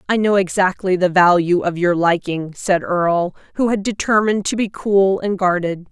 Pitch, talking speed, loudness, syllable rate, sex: 190 Hz, 180 wpm, -17 LUFS, 5.0 syllables/s, female